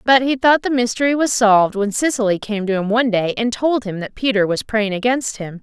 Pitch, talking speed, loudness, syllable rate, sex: 225 Hz, 245 wpm, -17 LUFS, 5.6 syllables/s, female